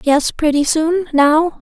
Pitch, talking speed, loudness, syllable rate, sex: 310 Hz, 145 wpm, -15 LUFS, 3.4 syllables/s, female